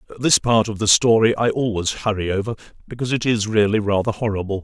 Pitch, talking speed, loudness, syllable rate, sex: 110 Hz, 195 wpm, -19 LUFS, 6.4 syllables/s, male